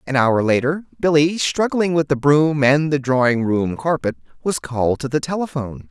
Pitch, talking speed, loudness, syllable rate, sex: 140 Hz, 185 wpm, -18 LUFS, 5.1 syllables/s, male